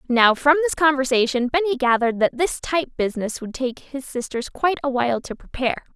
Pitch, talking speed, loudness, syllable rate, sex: 265 Hz, 190 wpm, -21 LUFS, 6.2 syllables/s, female